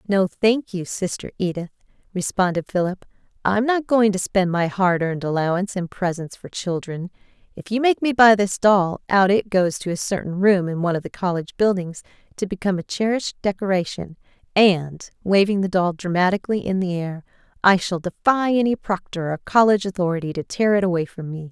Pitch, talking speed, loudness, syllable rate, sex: 190 Hz, 185 wpm, -21 LUFS, 5.6 syllables/s, female